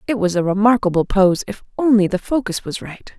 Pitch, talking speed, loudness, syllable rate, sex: 205 Hz, 205 wpm, -17 LUFS, 5.7 syllables/s, female